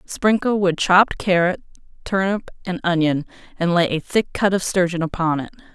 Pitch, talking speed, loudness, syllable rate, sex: 180 Hz, 165 wpm, -20 LUFS, 5.2 syllables/s, female